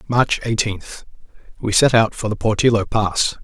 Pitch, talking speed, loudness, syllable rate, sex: 110 Hz, 140 wpm, -18 LUFS, 4.6 syllables/s, male